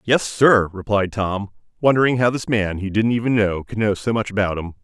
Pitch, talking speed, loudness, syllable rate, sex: 105 Hz, 225 wpm, -19 LUFS, 5.4 syllables/s, male